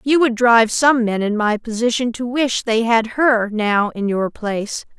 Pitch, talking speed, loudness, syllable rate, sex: 230 Hz, 205 wpm, -17 LUFS, 4.4 syllables/s, female